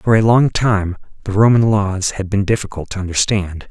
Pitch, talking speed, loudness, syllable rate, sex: 100 Hz, 195 wpm, -16 LUFS, 5.0 syllables/s, male